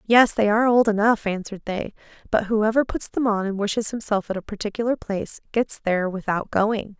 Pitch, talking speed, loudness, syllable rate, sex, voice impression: 210 Hz, 195 wpm, -22 LUFS, 5.6 syllables/s, female, feminine, adult-like, tensed, bright, slightly soft, slightly muffled, fluent, slightly cute, calm, friendly, elegant, kind